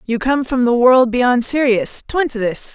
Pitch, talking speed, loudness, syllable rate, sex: 250 Hz, 220 wpm, -15 LUFS, 4.3 syllables/s, female